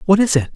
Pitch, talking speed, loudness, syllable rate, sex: 185 Hz, 325 wpm, -15 LUFS, 7.5 syllables/s, male